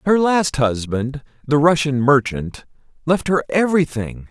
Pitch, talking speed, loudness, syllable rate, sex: 145 Hz, 125 wpm, -18 LUFS, 4.3 syllables/s, male